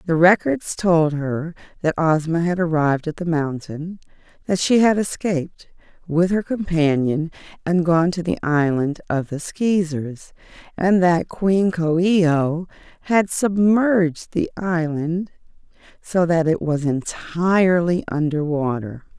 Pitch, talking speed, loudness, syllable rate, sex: 170 Hz, 135 wpm, -20 LUFS, 4.0 syllables/s, female